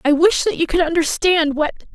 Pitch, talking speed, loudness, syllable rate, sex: 325 Hz, 215 wpm, -17 LUFS, 5.5 syllables/s, female